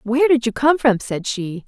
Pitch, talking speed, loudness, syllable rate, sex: 245 Hz, 250 wpm, -18 LUFS, 5.1 syllables/s, female